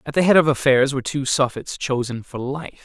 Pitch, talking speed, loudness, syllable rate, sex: 135 Hz, 230 wpm, -20 LUFS, 6.0 syllables/s, male